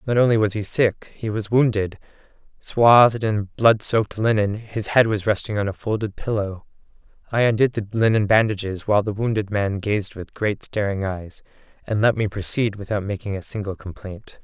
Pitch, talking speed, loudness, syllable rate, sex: 105 Hz, 185 wpm, -21 LUFS, 5.1 syllables/s, male